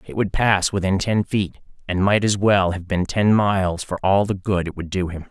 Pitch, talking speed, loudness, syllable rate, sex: 95 Hz, 240 wpm, -20 LUFS, 5.0 syllables/s, male